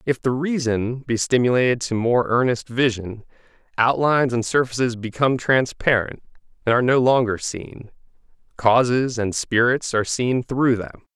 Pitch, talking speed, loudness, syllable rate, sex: 120 Hz, 140 wpm, -20 LUFS, 4.8 syllables/s, male